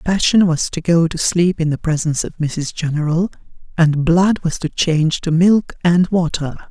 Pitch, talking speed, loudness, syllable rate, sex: 165 Hz, 190 wpm, -16 LUFS, 4.8 syllables/s, female